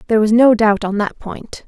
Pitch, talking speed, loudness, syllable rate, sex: 220 Hz, 250 wpm, -14 LUFS, 5.4 syllables/s, female